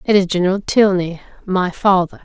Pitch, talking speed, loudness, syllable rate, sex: 185 Hz, 160 wpm, -16 LUFS, 5.3 syllables/s, female